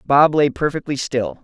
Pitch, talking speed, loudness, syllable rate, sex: 140 Hz, 165 wpm, -18 LUFS, 4.5 syllables/s, male